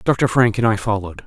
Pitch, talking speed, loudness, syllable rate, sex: 110 Hz, 235 wpm, -18 LUFS, 6.0 syllables/s, male